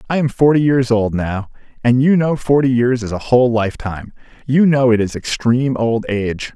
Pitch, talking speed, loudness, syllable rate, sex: 125 Hz, 200 wpm, -16 LUFS, 5.5 syllables/s, male